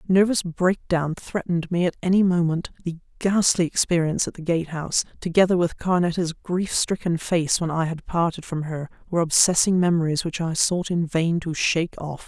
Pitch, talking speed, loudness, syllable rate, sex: 170 Hz, 180 wpm, -22 LUFS, 5.3 syllables/s, female